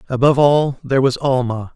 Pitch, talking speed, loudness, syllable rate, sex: 130 Hz, 170 wpm, -16 LUFS, 6.2 syllables/s, male